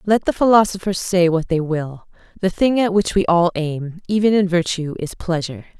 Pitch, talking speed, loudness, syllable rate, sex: 180 Hz, 195 wpm, -18 LUFS, 5.2 syllables/s, female